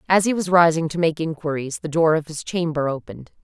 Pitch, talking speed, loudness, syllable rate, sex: 160 Hz, 225 wpm, -21 LUFS, 6.0 syllables/s, female